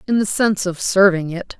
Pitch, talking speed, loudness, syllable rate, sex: 190 Hz, 225 wpm, -17 LUFS, 5.6 syllables/s, female